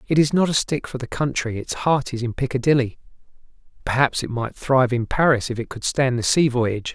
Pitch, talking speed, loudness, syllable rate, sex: 130 Hz, 225 wpm, -21 LUFS, 5.8 syllables/s, male